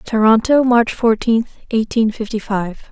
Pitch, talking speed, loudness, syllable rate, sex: 225 Hz, 125 wpm, -16 LUFS, 4.2 syllables/s, female